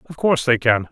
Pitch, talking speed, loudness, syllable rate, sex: 130 Hz, 260 wpm, -18 LUFS, 7.0 syllables/s, male